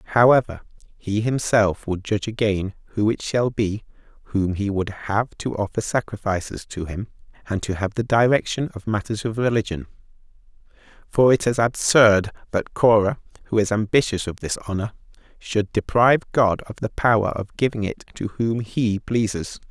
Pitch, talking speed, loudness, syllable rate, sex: 105 Hz, 160 wpm, -22 LUFS, 5.0 syllables/s, male